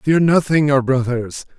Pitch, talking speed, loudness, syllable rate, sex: 140 Hz, 150 wpm, -16 LUFS, 4.2 syllables/s, male